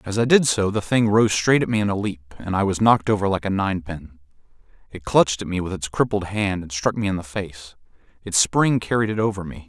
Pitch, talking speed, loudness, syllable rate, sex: 100 Hz, 255 wpm, -21 LUFS, 5.8 syllables/s, male